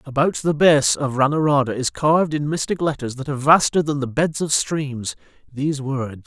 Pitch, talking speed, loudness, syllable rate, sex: 140 Hz, 190 wpm, -20 LUFS, 5.2 syllables/s, male